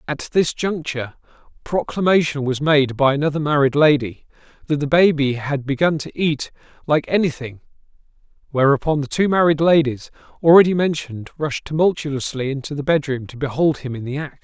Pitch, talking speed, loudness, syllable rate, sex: 145 Hz, 155 wpm, -19 LUFS, 5.4 syllables/s, male